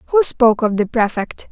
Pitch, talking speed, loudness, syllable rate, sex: 235 Hz, 200 wpm, -16 LUFS, 4.8 syllables/s, female